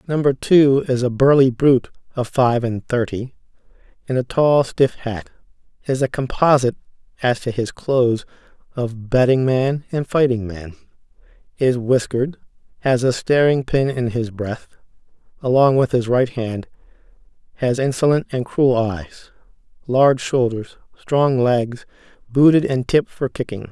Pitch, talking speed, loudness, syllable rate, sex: 125 Hz, 140 wpm, -18 LUFS, 4.6 syllables/s, male